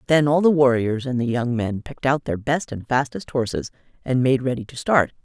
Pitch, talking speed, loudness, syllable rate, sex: 130 Hz, 230 wpm, -21 LUFS, 5.4 syllables/s, female